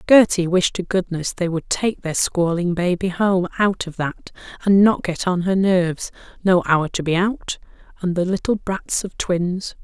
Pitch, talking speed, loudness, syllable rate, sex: 180 Hz, 190 wpm, -20 LUFS, 4.4 syllables/s, female